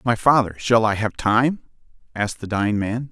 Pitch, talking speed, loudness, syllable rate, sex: 115 Hz, 190 wpm, -20 LUFS, 5.3 syllables/s, male